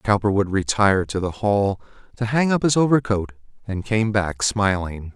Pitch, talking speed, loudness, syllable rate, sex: 105 Hz, 165 wpm, -21 LUFS, 4.7 syllables/s, male